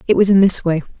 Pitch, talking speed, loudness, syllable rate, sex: 185 Hz, 300 wpm, -14 LUFS, 7.3 syllables/s, female